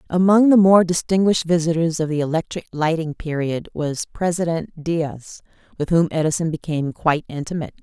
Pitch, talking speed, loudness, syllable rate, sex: 165 Hz, 145 wpm, -20 LUFS, 5.7 syllables/s, female